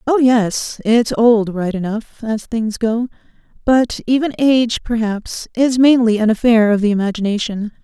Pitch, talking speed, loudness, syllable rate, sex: 230 Hz, 155 wpm, -16 LUFS, 4.4 syllables/s, female